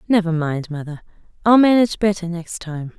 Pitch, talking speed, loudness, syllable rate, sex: 180 Hz, 160 wpm, -19 LUFS, 5.4 syllables/s, female